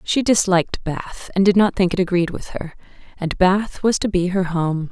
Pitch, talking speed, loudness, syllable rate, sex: 185 Hz, 220 wpm, -19 LUFS, 4.8 syllables/s, female